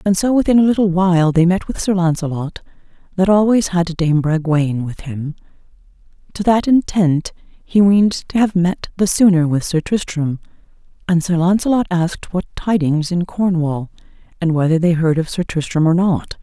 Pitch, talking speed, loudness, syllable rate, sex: 175 Hz, 175 wpm, -16 LUFS, 5.0 syllables/s, female